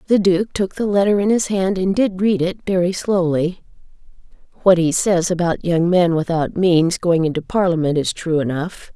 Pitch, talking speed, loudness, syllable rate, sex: 180 Hz, 190 wpm, -18 LUFS, 4.8 syllables/s, female